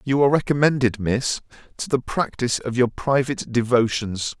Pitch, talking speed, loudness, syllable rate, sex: 125 Hz, 150 wpm, -21 LUFS, 5.4 syllables/s, male